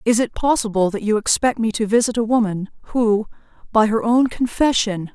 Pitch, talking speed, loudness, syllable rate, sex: 225 Hz, 185 wpm, -19 LUFS, 5.3 syllables/s, female